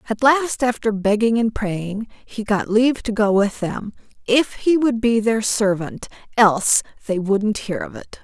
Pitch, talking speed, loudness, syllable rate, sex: 220 Hz, 180 wpm, -19 LUFS, 4.3 syllables/s, female